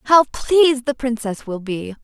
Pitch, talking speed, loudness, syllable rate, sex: 250 Hz, 175 wpm, -18 LUFS, 4.1 syllables/s, female